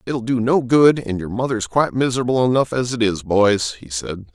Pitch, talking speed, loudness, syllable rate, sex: 115 Hz, 220 wpm, -18 LUFS, 5.3 syllables/s, male